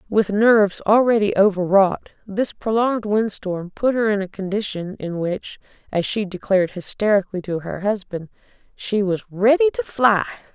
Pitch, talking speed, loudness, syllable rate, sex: 205 Hz, 150 wpm, -20 LUFS, 5.0 syllables/s, female